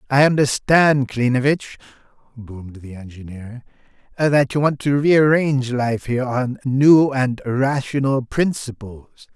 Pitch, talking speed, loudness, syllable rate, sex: 130 Hz, 115 wpm, -18 LUFS, 4.3 syllables/s, male